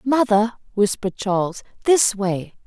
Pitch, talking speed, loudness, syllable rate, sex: 210 Hz, 115 wpm, -20 LUFS, 4.5 syllables/s, female